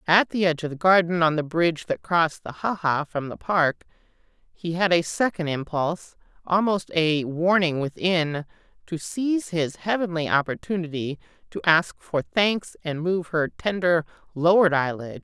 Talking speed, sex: 175 wpm, female